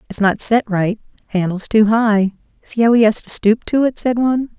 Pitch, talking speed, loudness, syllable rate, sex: 220 Hz, 220 wpm, -16 LUFS, 5.1 syllables/s, female